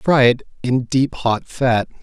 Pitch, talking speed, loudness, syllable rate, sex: 125 Hz, 150 wpm, -18 LUFS, 3.1 syllables/s, male